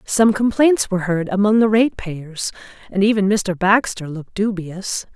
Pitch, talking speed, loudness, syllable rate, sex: 200 Hz, 150 wpm, -18 LUFS, 4.8 syllables/s, female